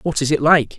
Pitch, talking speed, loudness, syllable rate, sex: 145 Hz, 305 wpm, -16 LUFS, 5.8 syllables/s, male